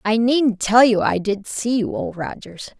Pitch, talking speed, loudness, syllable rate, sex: 225 Hz, 215 wpm, -19 LUFS, 4.2 syllables/s, female